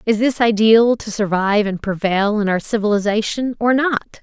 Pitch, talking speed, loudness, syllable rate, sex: 215 Hz, 170 wpm, -17 LUFS, 4.9 syllables/s, female